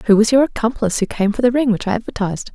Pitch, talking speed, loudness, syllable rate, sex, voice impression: 220 Hz, 285 wpm, -17 LUFS, 7.5 syllables/s, female, very feminine, slightly gender-neutral, adult-like, slightly middle-aged, thin, tensed, slightly powerful, bright, hard, very clear, very fluent, cute, slightly cool, very intellectual, refreshing, very sincere, slightly calm, friendly, reassuring, unique, elegant, sweet, lively, strict, intense, sharp